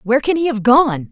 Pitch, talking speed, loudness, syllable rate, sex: 250 Hz, 270 wpm, -14 LUFS, 5.9 syllables/s, female